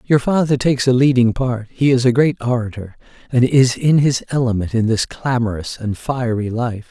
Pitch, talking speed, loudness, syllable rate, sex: 120 Hz, 190 wpm, -17 LUFS, 5.1 syllables/s, male